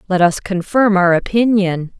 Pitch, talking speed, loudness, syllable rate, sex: 190 Hz, 150 wpm, -15 LUFS, 4.5 syllables/s, female